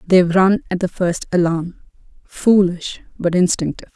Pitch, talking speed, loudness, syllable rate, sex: 180 Hz, 120 wpm, -17 LUFS, 4.8 syllables/s, female